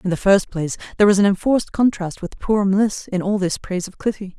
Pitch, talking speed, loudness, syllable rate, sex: 195 Hz, 245 wpm, -19 LUFS, 6.2 syllables/s, female